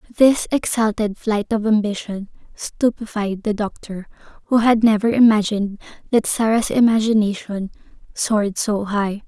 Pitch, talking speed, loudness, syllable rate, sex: 215 Hz, 115 wpm, -19 LUFS, 4.6 syllables/s, female